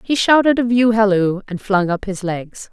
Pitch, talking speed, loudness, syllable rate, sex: 210 Hz, 220 wpm, -16 LUFS, 4.7 syllables/s, female